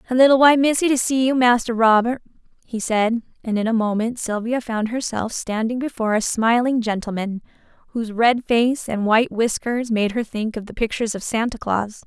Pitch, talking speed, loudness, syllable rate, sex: 230 Hz, 190 wpm, -20 LUFS, 5.4 syllables/s, female